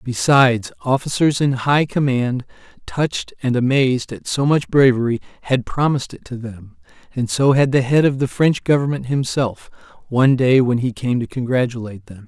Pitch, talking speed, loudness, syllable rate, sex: 130 Hz, 170 wpm, -18 LUFS, 5.2 syllables/s, male